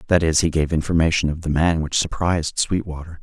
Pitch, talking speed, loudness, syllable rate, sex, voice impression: 80 Hz, 205 wpm, -20 LUFS, 5.9 syllables/s, male, slightly masculine, slightly adult-like, dark, cool, intellectual, calm, slightly wild, slightly kind, slightly modest